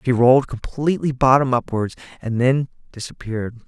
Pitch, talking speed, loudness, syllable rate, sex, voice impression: 125 Hz, 130 wpm, -19 LUFS, 5.6 syllables/s, male, very masculine, adult-like, thick, relaxed, slightly weak, dark, soft, clear, fluent, cool, very intellectual, refreshing, sincere, very calm, mature, friendly, reassuring, unique, elegant, slightly wild, sweet, slightly lively, very kind, slightly modest